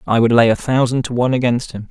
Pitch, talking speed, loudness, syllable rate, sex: 120 Hz, 285 wpm, -16 LUFS, 6.8 syllables/s, male